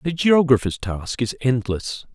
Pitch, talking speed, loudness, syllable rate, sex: 125 Hz, 140 wpm, -21 LUFS, 4.1 syllables/s, male